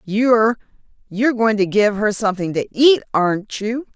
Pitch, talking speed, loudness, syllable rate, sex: 215 Hz, 150 wpm, -17 LUFS, 5.2 syllables/s, female